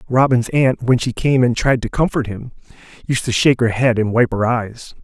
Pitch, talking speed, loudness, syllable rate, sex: 120 Hz, 225 wpm, -17 LUFS, 5.2 syllables/s, male